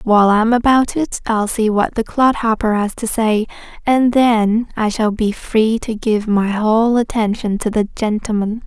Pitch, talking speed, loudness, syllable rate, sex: 220 Hz, 185 wpm, -16 LUFS, 4.3 syllables/s, female